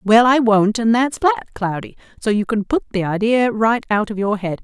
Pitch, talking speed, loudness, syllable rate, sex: 220 Hz, 235 wpm, -17 LUFS, 4.8 syllables/s, female